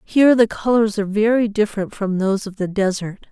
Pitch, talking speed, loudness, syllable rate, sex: 210 Hz, 200 wpm, -18 LUFS, 6.1 syllables/s, female